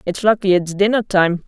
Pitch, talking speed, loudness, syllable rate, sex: 195 Hz, 205 wpm, -16 LUFS, 5.2 syllables/s, female